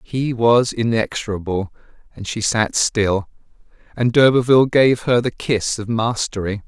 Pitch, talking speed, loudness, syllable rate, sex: 115 Hz, 135 wpm, -18 LUFS, 4.4 syllables/s, male